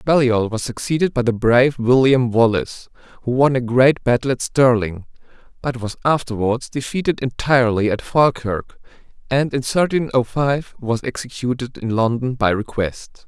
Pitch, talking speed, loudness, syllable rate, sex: 125 Hz, 150 wpm, -18 LUFS, 4.8 syllables/s, male